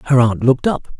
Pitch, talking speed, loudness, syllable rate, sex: 130 Hz, 240 wpm, -15 LUFS, 6.9 syllables/s, male